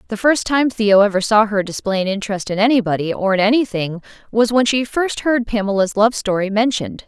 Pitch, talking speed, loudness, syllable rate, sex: 215 Hz, 205 wpm, -17 LUFS, 5.8 syllables/s, female